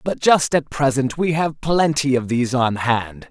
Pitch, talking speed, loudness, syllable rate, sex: 140 Hz, 200 wpm, -19 LUFS, 4.4 syllables/s, male